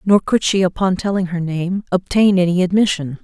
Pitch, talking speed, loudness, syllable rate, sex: 185 Hz, 185 wpm, -17 LUFS, 5.2 syllables/s, female